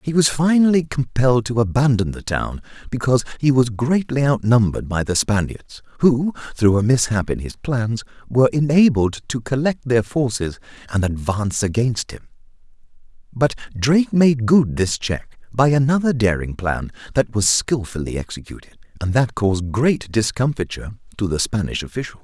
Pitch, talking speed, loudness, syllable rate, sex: 120 Hz, 150 wpm, -19 LUFS, 5.1 syllables/s, male